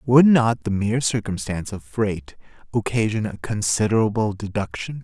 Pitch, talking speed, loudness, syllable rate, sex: 110 Hz, 130 wpm, -22 LUFS, 5.0 syllables/s, male